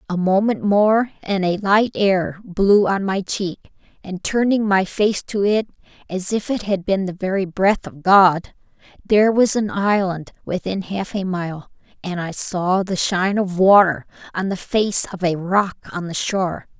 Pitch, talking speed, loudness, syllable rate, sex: 190 Hz, 180 wpm, -19 LUFS, 4.3 syllables/s, female